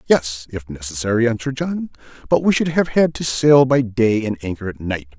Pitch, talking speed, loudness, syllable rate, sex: 120 Hz, 210 wpm, -18 LUFS, 5.3 syllables/s, male